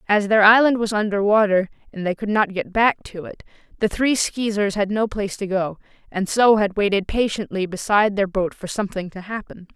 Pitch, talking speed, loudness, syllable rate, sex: 205 Hz, 210 wpm, -20 LUFS, 5.5 syllables/s, female